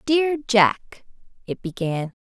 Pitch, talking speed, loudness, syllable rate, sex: 225 Hz, 110 wpm, -21 LUFS, 3.2 syllables/s, female